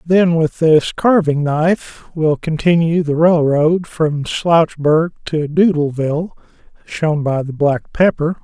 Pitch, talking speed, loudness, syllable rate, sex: 160 Hz, 130 wpm, -15 LUFS, 3.7 syllables/s, male